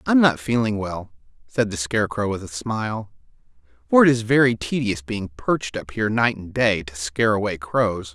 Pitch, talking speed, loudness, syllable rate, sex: 105 Hz, 190 wpm, -22 LUFS, 5.3 syllables/s, male